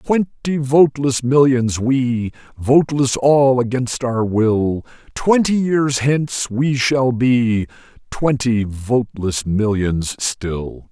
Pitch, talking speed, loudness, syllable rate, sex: 125 Hz, 105 wpm, -17 LUFS, 3.3 syllables/s, male